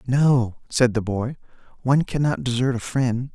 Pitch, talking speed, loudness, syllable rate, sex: 125 Hz, 160 wpm, -22 LUFS, 4.5 syllables/s, male